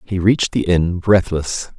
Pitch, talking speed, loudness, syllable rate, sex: 90 Hz, 170 wpm, -17 LUFS, 4.3 syllables/s, male